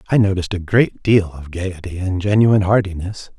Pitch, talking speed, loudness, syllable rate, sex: 95 Hz, 175 wpm, -18 LUFS, 5.4 syllables/s, male